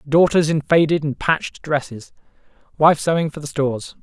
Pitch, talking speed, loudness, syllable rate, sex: 150 Hz, 165 wpm, -19 LUFS, 5.2 syllables/s, male